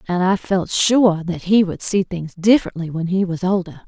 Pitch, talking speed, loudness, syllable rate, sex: 185 Hz, 215 wpm, -18 LUFS, 5.1 syllables/s, female